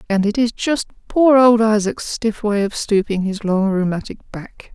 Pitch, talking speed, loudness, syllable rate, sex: 215 Hz, 190 wpm, -17 LUFS, 4.3 syllables/s, female